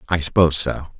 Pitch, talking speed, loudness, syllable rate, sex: 80 Hz, 180 wpm, -19 LUFS, 6.9 syllables/s, male